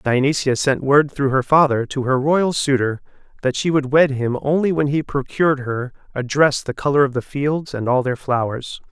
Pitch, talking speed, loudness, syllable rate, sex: 135 Hz, 210 wpm, -19 LUFS, 4.9 syllables/s, male